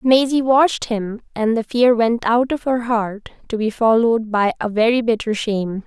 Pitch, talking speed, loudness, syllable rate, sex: 230 Hz, 195 wpm, -18 LUFS, 4.8 syllables/s, female